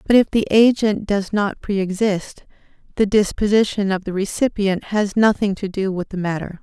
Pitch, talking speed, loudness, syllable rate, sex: 200 Hz, 180 wpm, -19 LUFS, 4.9 syllables/s, female